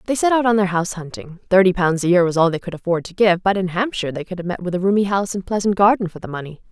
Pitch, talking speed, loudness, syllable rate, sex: 185 Hz, 315 wpm, -18 LUFS, 7.2 syllables/s, female